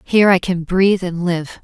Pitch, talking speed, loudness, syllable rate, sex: 180 Hz, 220 wpm, -16 LUFS, 5.2 syllables/s, female